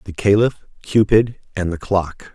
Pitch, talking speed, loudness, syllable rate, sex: 100 Hz, 155 wpm, -18 LUFS, 4.2 syllables/s, male